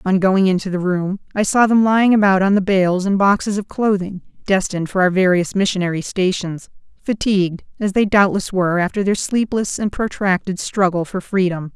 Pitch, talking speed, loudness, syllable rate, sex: 190 Hz, 185 wpm, -17 LUFS, 5.4 syllables/s, female